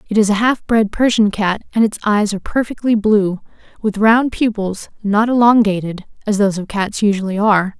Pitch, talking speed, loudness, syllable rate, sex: 210 Hz, 185 wpm, -16 LUFS, 5.4 syllables/s, female